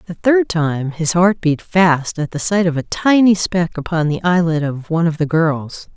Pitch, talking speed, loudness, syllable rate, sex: 170 Hz, 220 wpm, -16 LUFS, 4.5 syllables/s, female